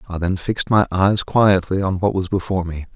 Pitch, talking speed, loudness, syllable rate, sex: 95 Hz, 225 wpm, -19 LUFS, 5.6 syllables/s, male